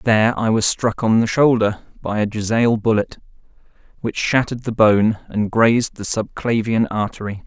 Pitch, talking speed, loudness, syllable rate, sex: 110 Hz, 160 wpm, -18 LUFS, 5.0 syllables/s, male